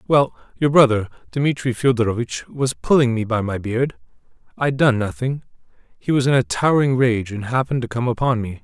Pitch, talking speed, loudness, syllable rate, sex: 125 Hz, 180 wpm, -19 LUFS, 5.5 syllables/s, male